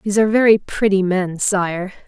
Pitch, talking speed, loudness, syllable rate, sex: 195 Hz, 175 wpm, -17 LUFS, 5.4 syllables/s, female